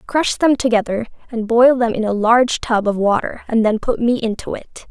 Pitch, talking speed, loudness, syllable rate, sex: 230 Hz, 220 wpm, -17 LUFS, 5.1 syllables/s, female